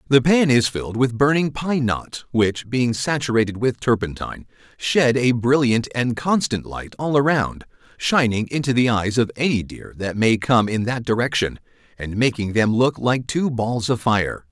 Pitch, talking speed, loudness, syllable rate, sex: 120 Hz, 180 wpm, -20 LUFS, 4.6 syllables/s, male